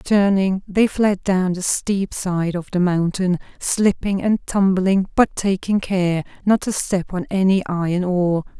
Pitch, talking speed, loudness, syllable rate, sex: 190 Hz, 160 wpm, -19 LUFS, 4.0 syllables/s, female